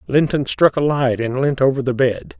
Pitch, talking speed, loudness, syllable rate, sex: 135 Hz, 225 wpm, -18 LUFS, 5.0 syllables/s, male